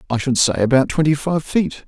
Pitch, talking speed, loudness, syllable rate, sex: 140 Hz, 225 wpm, -17 LUFS, 5.5 syllables/s, male